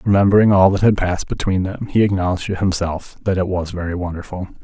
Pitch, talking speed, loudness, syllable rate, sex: 95 Hz, 205 wpm, -18 LUFS, 6.5 syllables/s, male